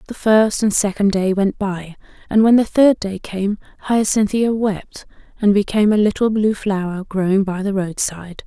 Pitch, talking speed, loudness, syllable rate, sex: 200 Hz, 175 wpm, -17 LUFS, 4.8 syllables/s, female